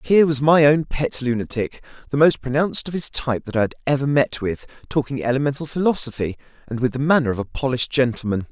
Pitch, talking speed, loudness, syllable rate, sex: 135 Hz, 190 wpm, -20 LUFS, 6.4 syllables/s, male